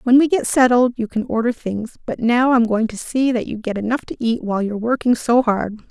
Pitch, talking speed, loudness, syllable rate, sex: 235 Hz, 255 wpm, -18 LUFS, 5.6 syllables/s, female